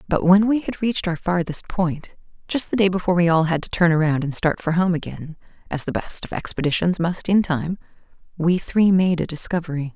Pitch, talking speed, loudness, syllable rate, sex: 175 Hz, 215 wpm, -21 LUFS, 5.6 syllables/s, female